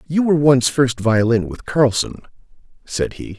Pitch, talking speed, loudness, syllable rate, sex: 130 Hz, 160 wpm, -17 LUFS, 4.7 syllables/s, male